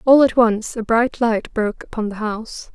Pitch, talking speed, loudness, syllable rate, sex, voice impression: 225 Hz, 220 wpm, -19 LUFS, 4.9 syllables/s, female, feminine, adult-like, relaxed, slightly weak, soft, fluent, calm, reassuring, elegant, kind, modest